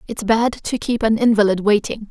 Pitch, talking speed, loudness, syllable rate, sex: 220 Hz, 200 wpm, -18 LUFS, 5.1 syllables/s, female